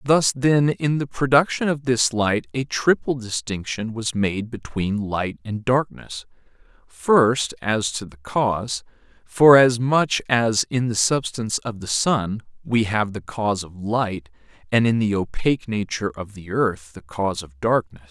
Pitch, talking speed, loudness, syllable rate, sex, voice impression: 110 Hz, 160 wpm, -21 LUFS, 4.2 syllables/s, male, very masculine, adult-like, middle-aged, thick, tensed, powerful, bright, hard, clear, fluent, cool, very intellectual, slightly refreshing, sincere, very calm, slightly mature, very friendly, reassuring, unique, elegant, slightly wild, sweet, lively, strict, slightly intense, slightly modest